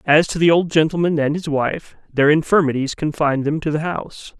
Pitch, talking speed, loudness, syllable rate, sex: 155 Hz, 205 wpm, -18 LUFS, 5.5 syllables/s, male